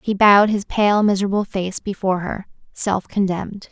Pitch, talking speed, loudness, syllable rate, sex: 200 Hz, 160 wpm, -19 LUFS, 5.3 syllables/s, female